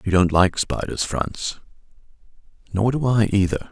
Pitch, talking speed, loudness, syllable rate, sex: 100 Hz, 145 wpm, -21 LUFS, 4.4 syllables/s, male